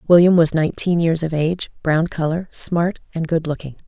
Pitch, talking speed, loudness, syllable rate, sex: 165 Hz, 185 wpm, -19 LUFS, 5.3 syllables/s, female